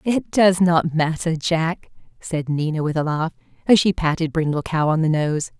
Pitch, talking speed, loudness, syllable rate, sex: 165 Hz, 195 wpm, -20 LUFS, 4.5 syllables/s, female